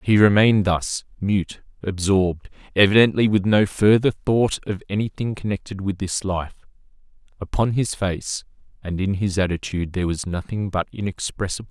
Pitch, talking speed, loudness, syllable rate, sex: 100 Hz, 150 wpm, -21 LUFS, 5.4 syllables/s, male